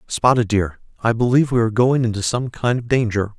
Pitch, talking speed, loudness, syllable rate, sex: 115 Hz, 215 wpm, -19 LUFS, 6.0 syllables/s, male